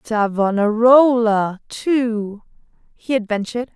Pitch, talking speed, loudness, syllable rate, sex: 225 Hz, 65 wpm, -17 LUFS, 3.6 syllables/s, female